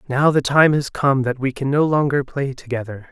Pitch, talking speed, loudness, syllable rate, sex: 135 Hz, 230 wpm, -19 LUFS, 5.1 syllables/s, male